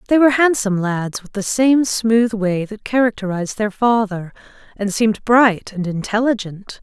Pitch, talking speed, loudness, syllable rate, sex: 215 Hz, 160 wpm, -17 LUFS, 4.8 syllables/s, female